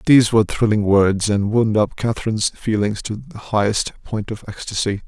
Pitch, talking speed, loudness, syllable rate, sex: 105 Hz, 175 wpm, -19 LUFS, 5.3 syllables/s, male